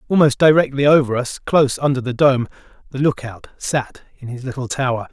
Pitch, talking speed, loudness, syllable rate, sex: 130 Hz, 175 wpm, -17 LUFS, 5.7 syllables/s, male